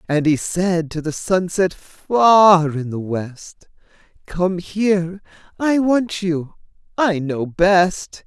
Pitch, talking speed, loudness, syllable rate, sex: 180 Hz, 130 wpm, -18 LUFS, 3.0 syllables/s, male